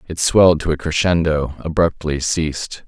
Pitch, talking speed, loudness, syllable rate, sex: 80 Hz, 145 wpm, -17 LUFS, 4.9 syllables/s, male